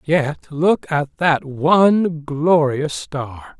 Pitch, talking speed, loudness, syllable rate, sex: 150 Hz, 115 wpm, -18 LUFS, 2.7 syllables/s, male